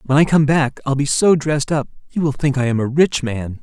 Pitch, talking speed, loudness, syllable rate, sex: 140 Hz, 280 wpm, -17 LUFS, 5.6 syllables/s, male